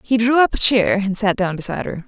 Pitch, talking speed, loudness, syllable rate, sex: 210 Hz, 290 wpm, -17 LUFS, 6.1 syllables/s, female